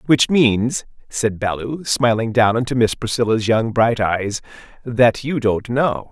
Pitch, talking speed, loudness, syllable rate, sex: 115 Hz, 155 wpm, -18 LUFS, 3.9 syllables/s, male